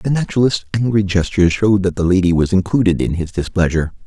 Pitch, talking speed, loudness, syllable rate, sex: 95 Hz, 190 wpm, -16 LUFS, 6.8 syllables/s, male